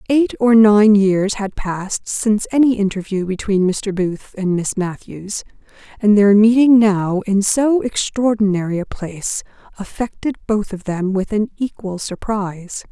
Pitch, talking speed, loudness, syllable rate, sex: 205 Hz, 150 wpm, -17 LUFS, 4.2 syllables/s, female